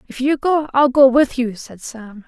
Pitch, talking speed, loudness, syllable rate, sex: 260 Hz, 240 wpm, -16 LUFS, 4.4 syllables/s, female